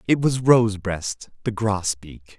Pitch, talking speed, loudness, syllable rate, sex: 105 Hz, 125 wpm, -22 LUFS, 3.9 syllables/s, male